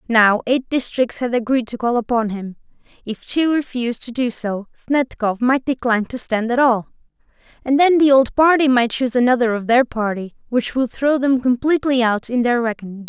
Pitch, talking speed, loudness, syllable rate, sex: 245 Hz, 195 wpm, -18 LUFS, 5.3 syllables/s, female